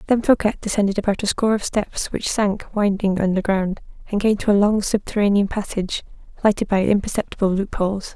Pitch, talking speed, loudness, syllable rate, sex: 200 Hz, 170 wpm, -20 LUFS, 6.0 syllables/s, female